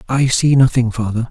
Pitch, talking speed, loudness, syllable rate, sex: 125 Hz, 185 wpm, -14 LUFS, 5.3 syllables/s, male